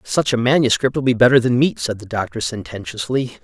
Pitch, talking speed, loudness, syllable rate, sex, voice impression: 120 Hz, 190 wpm, -18 LUFS, 5.4 syllables/s, male, masculine, adult-like, tensed, powerful, slightly clear, raspy, slightly mature, friendly, wild, lively, slightly strict